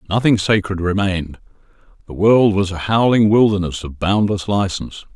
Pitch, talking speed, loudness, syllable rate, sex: 100 Hz, 140 wpm, -17 LUFS, 5.2 syllables/s, male